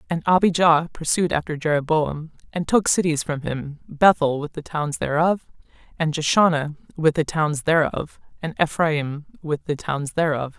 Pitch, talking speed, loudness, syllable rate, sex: 155 Hz, 155 wpm, -21 LUFS, 4.7 syllables/s, female